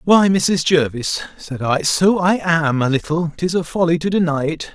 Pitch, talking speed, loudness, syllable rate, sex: 165 Hz, 200 wpm, -17 LUFS, 4.5 syllables/s, male